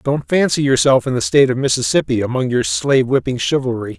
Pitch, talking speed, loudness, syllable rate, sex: 135 Hz, 180 wpm, -16 LUFS, 6.2 syllables/s, male